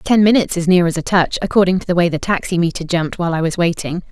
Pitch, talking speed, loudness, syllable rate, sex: 175 Hz, 260 wpm, -16 LUFS, 7.0 syllables/s, female